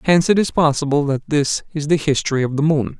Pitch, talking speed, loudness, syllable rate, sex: 150 Hz, 240 wpm, -18 LUFS, 6.3 syllables/s, male